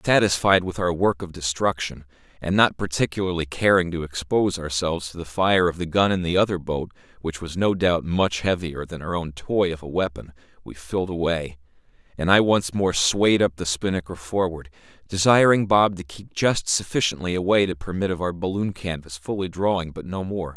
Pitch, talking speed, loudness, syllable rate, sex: 90 Hz, 195 wpm, -23 LUFS, 5.3 syllables/s, male